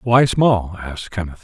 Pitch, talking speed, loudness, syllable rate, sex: 105 Hz, 165 wpm, -18 LUFS, 4.4 syllables/s, male